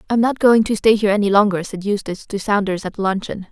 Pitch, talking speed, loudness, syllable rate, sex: 205 Hz, 240 wpm, -18 LUFS, 6.3 syllables/s, female